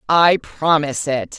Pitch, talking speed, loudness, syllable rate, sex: 150 Hz, 130 wpm, -17 LUFS, 4.3 syllables/s, female